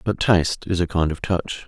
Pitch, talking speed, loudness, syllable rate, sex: 90 Hz, 250 wpm, -21 LUFS, 5.2 syllables/s, male